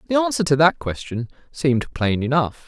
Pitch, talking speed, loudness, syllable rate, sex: 150 Hz, 180 wpm, -20 LUFS, 5.3 syllables/s, male